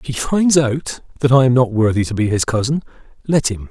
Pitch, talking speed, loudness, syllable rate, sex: 125 Hz, 245 wpm, -16 LUFS, 5.6 syllables/s, male